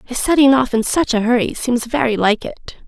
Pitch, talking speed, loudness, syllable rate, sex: 245 Hz, 230 wpm, -16 LUFS, 5.2 syllables/s, female